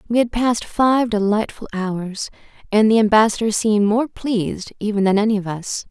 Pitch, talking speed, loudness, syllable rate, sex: 215 Hz, 175 wpm, -19 LUFS, 5.2 syllables/s, female